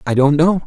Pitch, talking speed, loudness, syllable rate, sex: 155 Hz, 270 wpm, -14 LUFS, 5.5 syllables/s, male